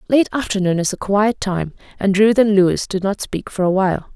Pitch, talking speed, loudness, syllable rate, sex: 200 Hz, 230 wpm, -17 LUFS, 5.2 syllables/s, female